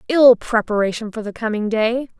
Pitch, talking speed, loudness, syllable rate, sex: 225 Hz, 165 wpm, -18 LUFS, 5.1 syllables/s, female